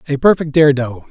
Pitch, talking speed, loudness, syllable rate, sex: 145 Hz, 215 wpm, -14 LUFS, 6.5 syllables/s, male